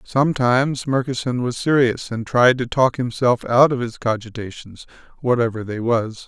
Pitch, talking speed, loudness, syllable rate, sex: 125 Hz, 155 wpm, -19 LUFS, 4.9 syllables/s, male